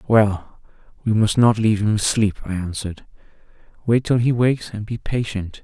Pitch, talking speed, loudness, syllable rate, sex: 110 Hz, 170 wpm, -20 LUFS, 5.2 syllables/s, male